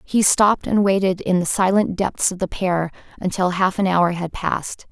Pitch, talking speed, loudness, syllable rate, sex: 185 Hz, 205 wpm, -19 LUFS, 4.9 syllables/s, female